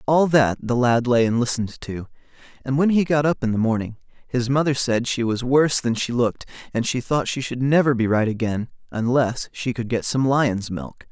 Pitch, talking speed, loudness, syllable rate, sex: 125 Hz, 220 wpm, -21 LUFS, 5.3 syllables/s, male